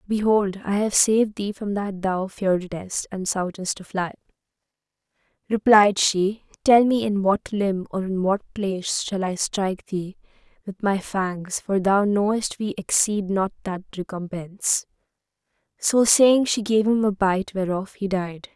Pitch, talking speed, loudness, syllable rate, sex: 200 Hz, 160 wpm, -22 LUFS, 4.2 syllables/s, female